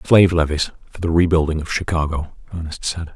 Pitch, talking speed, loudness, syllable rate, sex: 80 Hz, 170 wpm, -20 LUFS, 6.0 syllables/s, male